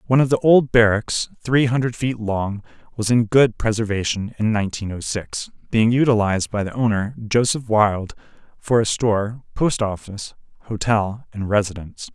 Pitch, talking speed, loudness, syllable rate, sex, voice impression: 110 Hz, 160 wpm, -20 LUFS, 5.1 syllables/s, male, masculine, adult-like, tensed, slightly bright, clear, intellectual, calm, friendly, slightly wild, lively, kind